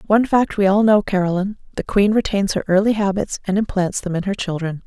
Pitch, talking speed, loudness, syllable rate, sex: 195 Hz, 220 wpm, -18 LUFS, 6.1 syllables/s, female